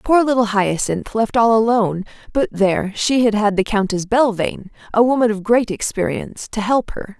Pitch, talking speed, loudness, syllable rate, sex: 215 Hz, 185 wpm, -18 LUFS, 5.2 syllables/s, female